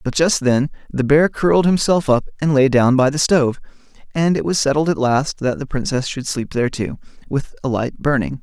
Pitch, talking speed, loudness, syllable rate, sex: 140 Hz, 220 wpm, -18 LUFS, 5.4 syllables/s, male